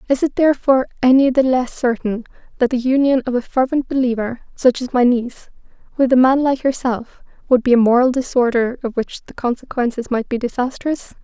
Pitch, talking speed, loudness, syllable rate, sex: 250 Hz, 185 wpm, -17 LUFS, 5.6 syllables/s, female